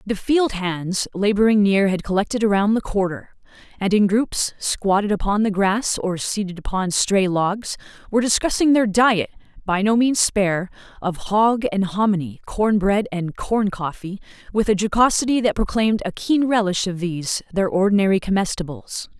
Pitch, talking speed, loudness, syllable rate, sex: 200 Hz, 155 wpm, -20 LUFS, 4.9 syllables/s, female